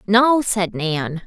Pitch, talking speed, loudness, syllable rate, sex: 200 Hz, 140 wpm, -18 LUFS, 2.7 syllables/s, female